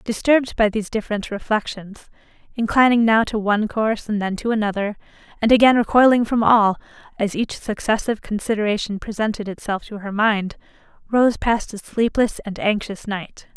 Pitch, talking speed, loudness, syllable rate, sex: 215 Hz, 155 wpm, -20 LUFS, 5.5 syllables/s, female